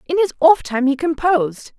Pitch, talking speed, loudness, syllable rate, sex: 300 Hz, 200 wpm, -17 LUFS, 5.1 syllables/s, female